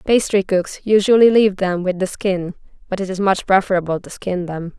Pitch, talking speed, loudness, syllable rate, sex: 190 Hz, 200 wpm, -17 LUFS, 5.4 syllables/s, female